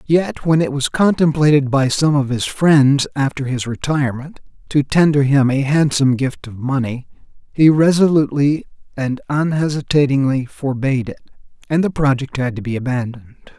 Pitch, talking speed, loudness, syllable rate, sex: 140 Hz, 150 wpm, -16 LUFS, 5.2 syllables/s, male